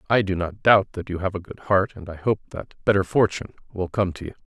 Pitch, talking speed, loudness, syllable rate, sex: 95 Hz, 270 wpm, -23 LUFS, 6.3 syllables/s, male